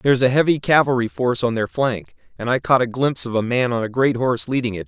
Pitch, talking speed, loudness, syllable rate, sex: 120 Hz, 270 wpm, -19 LUFS, 6.5 syllables/s, male